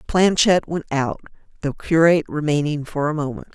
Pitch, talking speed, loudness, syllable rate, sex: 155 Hz, 150 wpm, -20 LUFS, 5.3 syllables/s, female